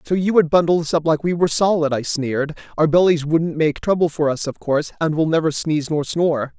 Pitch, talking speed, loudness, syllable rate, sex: 160 Hz, 245 wpm, -19 LUFS, 6.1 syllables/s, male